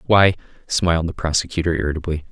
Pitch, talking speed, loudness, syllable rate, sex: 85 Hz, 130 wpm, -20 LUFS, 6.7 syllables/s, male